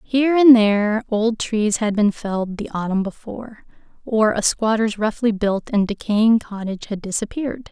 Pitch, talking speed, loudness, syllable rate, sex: 215 Hz, 165 wpm, -19 LUFS, 4.9 syllables/s, female